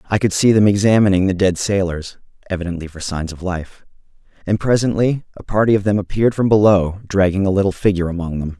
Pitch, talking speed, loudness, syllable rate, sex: 95 Hz, 195 wpm, -17 LUFS, 6.3 syllables/s, male